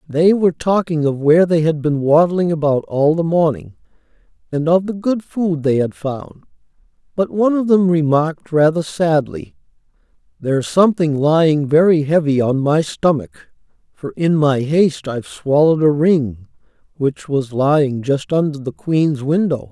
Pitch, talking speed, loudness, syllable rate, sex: 155 Hz, 160 wpm, -16 LUFS, 4.7 syllables/s, male